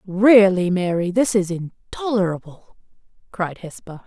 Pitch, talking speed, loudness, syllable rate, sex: 195 Hz, 105 wpm, -19 LUFS, 4.1 syllables/s, female